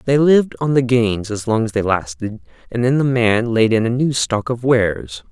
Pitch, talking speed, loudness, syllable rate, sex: 115 Hz, 235 wpm, -17 LUFS, 4.9 syllables/s, male